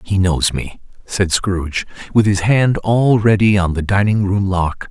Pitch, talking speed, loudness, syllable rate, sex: 100 Hz, 170 wpm, -16 LUFS, 4.2 syllables/s, male